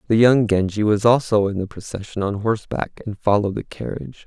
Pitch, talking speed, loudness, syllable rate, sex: 105 Hz, 195 wpm, -20 LUFS, 6.0 syllables/s, male